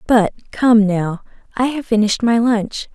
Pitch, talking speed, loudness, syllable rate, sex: 225 Hz, 165 wpm, -16 LUFS, 4.4 syllables/s, female